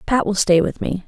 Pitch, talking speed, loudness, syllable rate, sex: 195 Hz, 280 wpm, -18 LUFS, 5.3 syllables/s, female